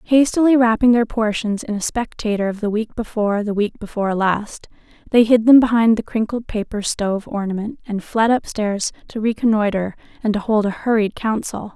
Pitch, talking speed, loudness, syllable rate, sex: 215 Hz, 180 wpm, -19 LUFS, 5.4 syllables/s, female